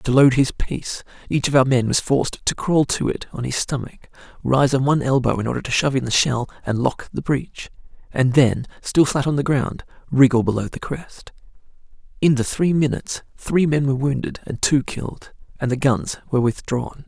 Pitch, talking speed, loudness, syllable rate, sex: 135 Hz, 205 wpm, -20 LUFS, 5.3 syllables/s, male